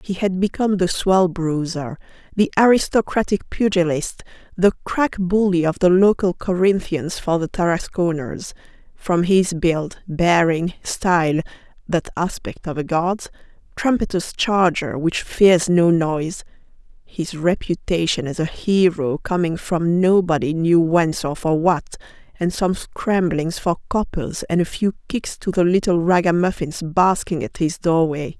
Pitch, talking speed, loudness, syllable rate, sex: 175 Hz, 135 wpm, -19 LUFS, 4.3 syllables/s, female